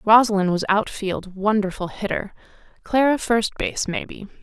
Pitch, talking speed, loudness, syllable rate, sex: 210 Hz, 120 wpm, -21 LUFS, 4.8 syllables/s, female